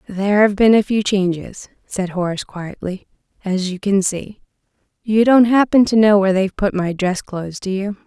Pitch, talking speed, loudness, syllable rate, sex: 200 Hz, 195 wpm, -17 LUFS, 5.2 syllables/s, female